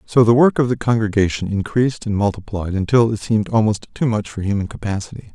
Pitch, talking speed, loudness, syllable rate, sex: 110 Hz, 200 wpm, -18 LUFS, 6.2 syllables/s, male